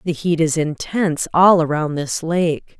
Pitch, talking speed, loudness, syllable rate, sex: 160 Hz, 170 wpm, -18 LUFS, 4.2 syllables/s, female